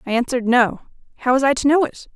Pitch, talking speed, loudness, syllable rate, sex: 255 Hz, 250 wpm, -18 LUFS, 7.1 syllables/s, female